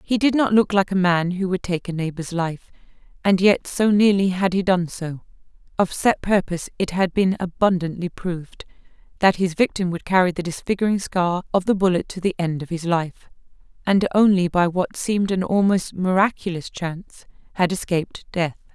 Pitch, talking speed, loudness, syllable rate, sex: 185 Hz, 185 wpm, -21 LUFS, 5.2 syllables/s, female